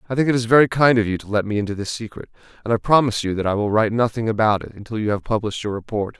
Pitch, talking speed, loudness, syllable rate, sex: 110 Hz, 300 wpm, -20 LUFS, 7.6 syllables/s, male